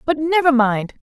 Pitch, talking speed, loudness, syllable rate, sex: 275 Hz, 175 wpm, -16 LUFS, 4.9 syllables/s, female